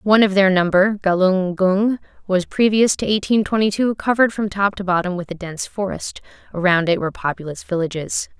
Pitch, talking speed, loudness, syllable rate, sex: 195 Hz, 185 wpm, -19 LUFS, 5.6 syllables/s, female